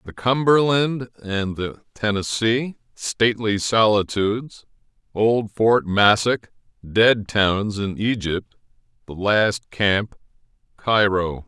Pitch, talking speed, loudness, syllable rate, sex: 110 Hz, 70 wpm, -20 LUFS, 3.4 syllables/s, male